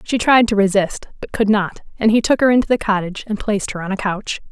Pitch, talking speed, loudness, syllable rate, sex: 210 Hz, 265 wpm, -17 LUFS, 6.2 syllables/s, female